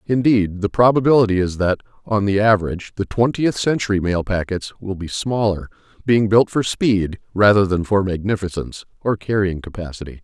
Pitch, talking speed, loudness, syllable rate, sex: 100 Hz, 160 wpm, -19 LUFS, 5.4 syllables/s, male